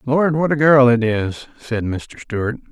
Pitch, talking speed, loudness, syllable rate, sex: 125 Hz, 200 wpm, -17 LUFS, 3.9 syllables/s, male